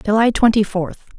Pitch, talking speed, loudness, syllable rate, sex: 215 Hz, 150 wpm, -16 LUFS, 5.2 syllables/s, female